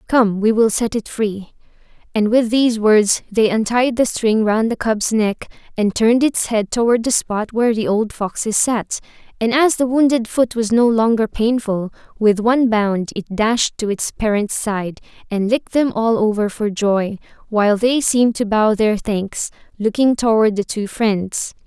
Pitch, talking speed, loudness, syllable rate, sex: 220 Hz, 185 wpm, -17 LUFS, 4.5 syllables/s, female